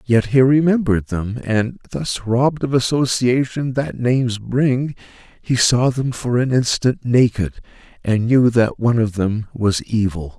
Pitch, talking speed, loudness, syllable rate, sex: 120 Hz, 155 wpm, -18 LUFS, 4.3 syllables/s, male